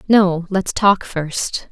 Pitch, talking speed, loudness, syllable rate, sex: 185 Hz, 140 wpm, -17 LUFS, 2.6 syllables/s, female